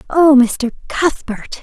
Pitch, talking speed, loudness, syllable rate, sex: 275 Hz, 110 wpm, -14 LUFS, 3.2 syllables/s, female